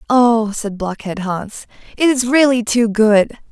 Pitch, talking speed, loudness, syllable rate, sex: 225 Hz, 155 wpm, -15 LUFS, 3.7 syllables/s, female